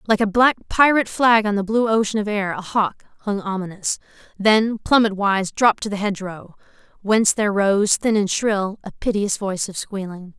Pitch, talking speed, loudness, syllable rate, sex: 205 Hz, 190 wpm, -19 LUFS, 5.2 syllables/s, female